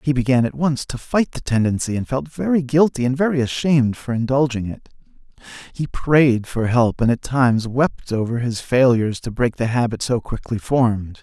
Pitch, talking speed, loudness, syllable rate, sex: 125 Hz, 190 wpm, -19 LUFS, 5.2 syllables/s, male